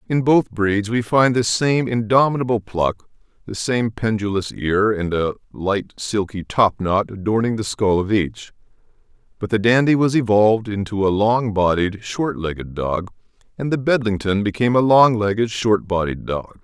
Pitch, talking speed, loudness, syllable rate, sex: 110 Hz, 160 wpm, -19 LUFS, 4.6 syllables/s, male